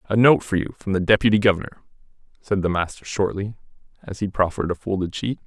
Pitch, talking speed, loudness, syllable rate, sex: 100 Hz, 200 wpm, -22 LUFS, 6.6 syllables/s, male